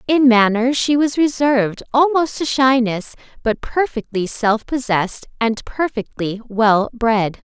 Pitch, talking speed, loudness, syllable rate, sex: 240 Hz, 130 wpm, -17 LUFS, 4.0 syllables/s, female